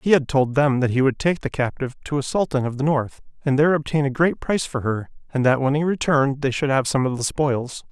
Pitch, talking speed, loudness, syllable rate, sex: 140 Hz, 275 wpm, -21 LUFS, 6.0 syllables/s, male